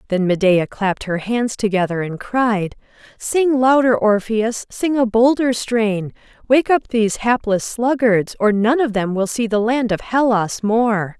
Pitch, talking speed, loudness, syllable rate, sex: 225 Hz, 165 wpm, -17 LUFS, 4.1 syllables/s, female